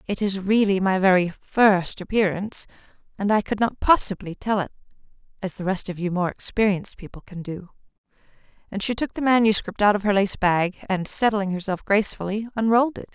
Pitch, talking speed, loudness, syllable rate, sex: 200 Hz, 185 wpm, -22 LUFS, 5.7 syllables/s, female